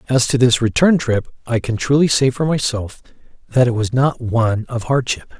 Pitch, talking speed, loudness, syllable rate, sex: 125 Hz, 200 wpm, -17 LUFS, 5.2 syllables/s, male